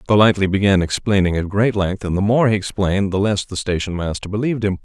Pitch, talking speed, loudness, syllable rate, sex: 100 Hz, 225 wpm, -18 LUFS, 6.3 syllables/s, male